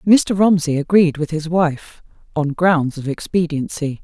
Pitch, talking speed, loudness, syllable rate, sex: 165 Hz, 150 wpm, -18 LUFS, 4.2 syllables/s, female